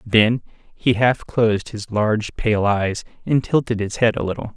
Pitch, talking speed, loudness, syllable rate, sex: 110 Hz, 185 wpm, -20 LUFS, 4.6 syllables/s, male